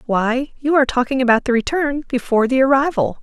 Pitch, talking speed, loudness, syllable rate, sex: 260 Hz, 185 wpm, -17 LUFS, 6.1 syllables/s, female